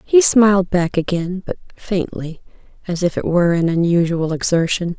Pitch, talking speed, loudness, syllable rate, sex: 175 Hz, 155 wpm, -17 LUFS, 5.0 syllables/s, female